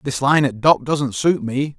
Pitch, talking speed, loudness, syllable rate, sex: 135 Hz, 235 wpm, -18 LUFS, 4.8 syllables/s, male